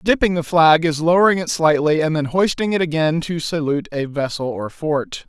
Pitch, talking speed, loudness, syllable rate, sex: 160 Hz, 205 wpm, -18 LUFS, 5.2 syllables/s, male